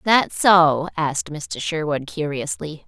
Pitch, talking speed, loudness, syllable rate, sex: 160 Hz, 125 wpm, -20 LUFS, 3.8 syllables/s, female